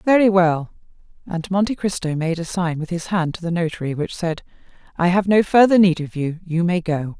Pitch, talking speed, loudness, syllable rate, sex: 175 Hz, 215 wpm, -19 LUFS, 5.3 syllables/s, female